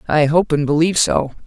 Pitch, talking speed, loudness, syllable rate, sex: 155 Hz, 205 wpm, -16 LUFS, 5.8 syllables/s, female